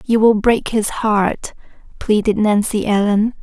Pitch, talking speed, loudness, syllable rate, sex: 215 Hz, 140 wpm, -16 LUFS, 4.0 syllables/s, female